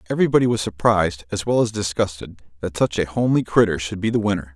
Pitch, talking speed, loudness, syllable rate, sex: 100 Hz, 210 wpm, -20 LUFS, 6.8 syllables/s, male